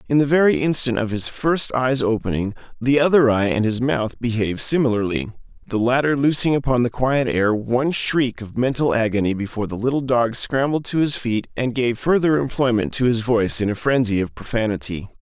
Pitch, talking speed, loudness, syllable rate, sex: 120 Hz, 195 wpm, -20 LUFS, 5.5 syllables/s, male